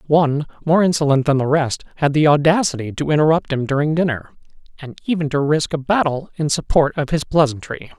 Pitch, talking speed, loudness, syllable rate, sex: 150 Hz, 190 wpm, -18 LUFS, 5.9 syllables/s, male